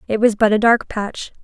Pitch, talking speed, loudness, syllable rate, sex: 220 Hz, 250 wpm, -17 LUFS, 5.0 syllables/s, female